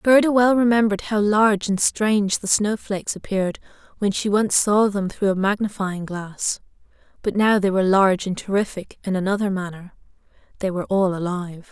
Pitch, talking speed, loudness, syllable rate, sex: 200 Hz, 170 wpm, -21 LUFS, 5.5 syllables/s, female